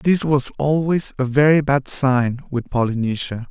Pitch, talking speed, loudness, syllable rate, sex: 135 Hz, 155 wpm, -19 LUFS, 4.3 syllables/s, male